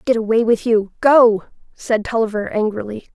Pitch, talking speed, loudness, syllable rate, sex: 225 Hz, 135 wpm, -17 LUFS, 5.0 syllables/s, female